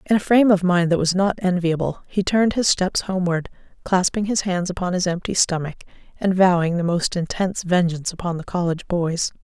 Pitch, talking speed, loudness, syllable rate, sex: 180 Hz, 195 wpm, -20 LUFS, 5.8 syllables/s, female